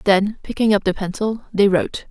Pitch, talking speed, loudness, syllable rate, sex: 200 Hz, 200 wpm, -19 LUFS, 5.4 syllables/s, female